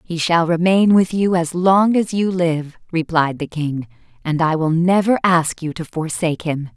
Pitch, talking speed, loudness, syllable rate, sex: 170 Hz, 195 wpm, -18 LUFS, 4.4 syllables/s, female